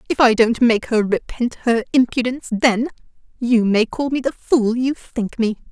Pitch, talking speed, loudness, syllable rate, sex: 235 Hz, 190 wpm, -18 LUFS, 4.6 syllables/s, female